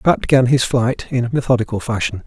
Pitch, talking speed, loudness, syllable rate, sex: 120 Hz, 185 wpm, -17 LUFS, 5.6 syllables/s, male